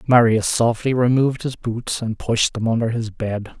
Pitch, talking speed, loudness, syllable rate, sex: 115 Hz, 185 wpm, -20 LUFS, 4.7 syllables/s, male